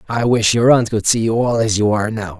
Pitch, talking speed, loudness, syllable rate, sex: 110 Hz, 300 wpm, -15 LUFS, 5.9 syllables/s, male